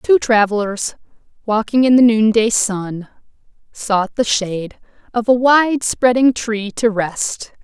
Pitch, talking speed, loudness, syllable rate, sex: 225 Hz, 125 wpm, -16 LUFS, 3.9 syllables/s, female